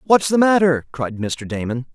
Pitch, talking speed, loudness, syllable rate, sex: 150 Hz, 185 wpm, -19 LUFS, 4.6 syllables/s, male